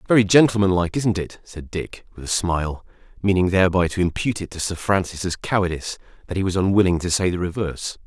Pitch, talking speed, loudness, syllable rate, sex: 90 Hz, 200 wpm, -21 LUFS, 6.5 syllables/s, male